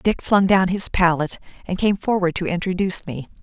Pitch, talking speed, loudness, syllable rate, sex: 185 Hz, 195 wpm, -20 LUFS, 5.6 syllables/s, female